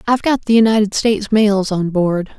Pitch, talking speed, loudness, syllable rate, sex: 210 Hz, 200 wpm, -15 LUFS, 5.6 syllables/s, female